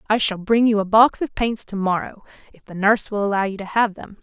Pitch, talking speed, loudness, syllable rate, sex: 210 Hz, 270 wpm, -20 LUFS, 5.9 syllables/s, female